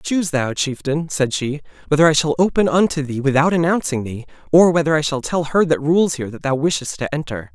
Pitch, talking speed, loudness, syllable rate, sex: 150 Hz, 225 wpm, -18 LUFS, 5.8 syllables/s, male